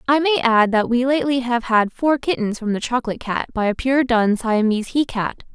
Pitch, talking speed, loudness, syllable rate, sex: 240 Hz, 225 wpm, -19 LUFS, 5.7 syllables/s, female